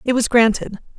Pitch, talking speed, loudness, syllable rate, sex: 230 Hz, 185 wpm, -17 LUFS, 5.7 syllables/s, female